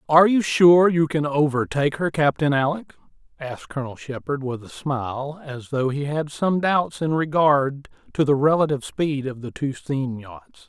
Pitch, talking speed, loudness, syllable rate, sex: 145 Hz, 180 wpm, -21 LUFS, 4.9 syllables/s, male